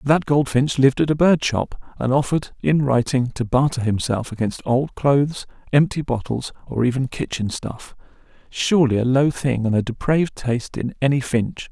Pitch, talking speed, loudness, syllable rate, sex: 130 Hz, 175 wpm, -20 LUFS, 5.2 syllables/s, male